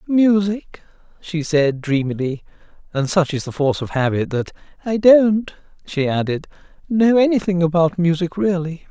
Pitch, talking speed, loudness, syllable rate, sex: 170 Hz, 140 wpm, -18 LUFS, 4.7 syllables/s, male